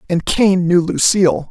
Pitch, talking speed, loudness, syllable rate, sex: 175 Hz, 160 wpm, -14 LUFS, 4.5 syllables/s, female